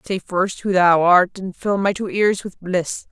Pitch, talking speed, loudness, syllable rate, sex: 185 Hz, 230 wpm, -18 LUFS, 4.1 syllables/s, female